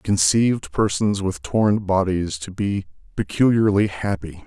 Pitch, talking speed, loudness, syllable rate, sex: 95 Hz, 135 wpm, -21 LUFS, 4.4 syllables/s, male